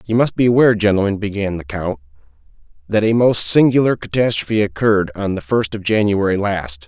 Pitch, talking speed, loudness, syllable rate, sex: 100 Hz, 175 wpm, -16 LUFS, 5.8 syllables/s, male